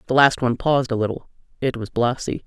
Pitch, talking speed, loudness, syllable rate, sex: 125 Hz, 220 wpm, -21 LUFS, 6.6 syllables/s, female